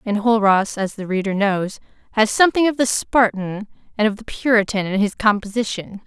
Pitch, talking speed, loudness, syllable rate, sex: 210 Hz, 170 wpm, -19 LUFS, 5.3 syllables/s, female